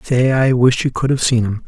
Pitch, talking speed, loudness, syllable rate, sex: 125 Hz, 285 wpm, -15 LUFS, 5.2 syllables/s, male